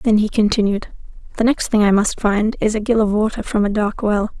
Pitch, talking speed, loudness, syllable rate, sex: 215 Hz, 245 wpm, -18 LUFS, 5.5 syllables/s, female